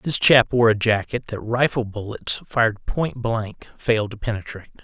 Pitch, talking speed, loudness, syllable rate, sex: 110 Hz, 175 wpm, -21 LUFS, 4.9 syllables/s, male